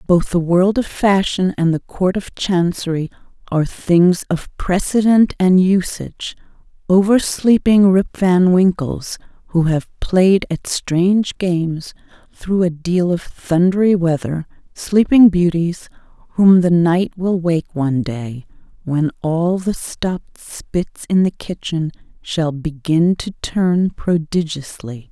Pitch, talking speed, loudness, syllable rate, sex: 175 Hz, 130 wpm, -16 LUFS, 3.7 syllables/s, female